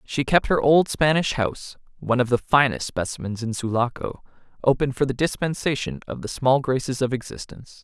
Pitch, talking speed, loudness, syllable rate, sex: 130 Hz, 175 wpm, -22 LUFS, 4.2 syllables/s, male